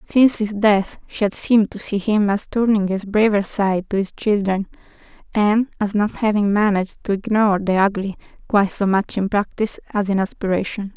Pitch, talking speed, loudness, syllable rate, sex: 205 Hz, 185 wpm, -19 LUFS, 5.4 syllables/s, female